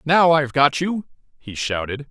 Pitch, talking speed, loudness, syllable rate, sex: 145 Hz, 170 wpm, -19 LUFS, 4.8 syllables/s, male